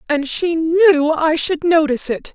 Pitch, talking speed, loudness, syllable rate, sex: 315 Hz, 180 wpm, -16 LUFS, 4.2 syllables/s, female